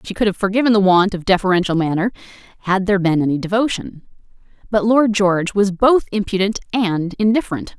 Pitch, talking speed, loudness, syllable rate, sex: 195 Hz, 160 wpm, -17 LUFS, 6.1 syllables/s, female